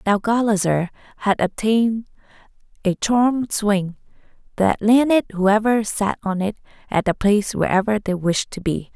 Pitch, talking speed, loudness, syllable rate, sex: 205 Hz, 140 wpm, -20 LUFS, 4.7 syllables/s, female